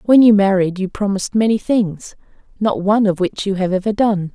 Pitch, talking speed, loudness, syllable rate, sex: 200 Hz, 205 wpm, -16 LUFS, 5.5 syllables/s, female